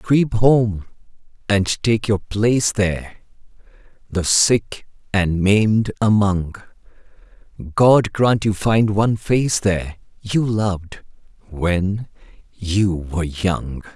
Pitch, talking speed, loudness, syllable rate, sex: 100 Hz, 110 wpm, -18 LUFS, 3.4 syllables/s, male